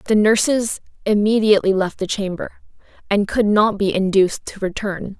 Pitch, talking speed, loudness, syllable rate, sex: 205 Hz, 150 wpm, -18 LUFS, 5.0 syllables/s, female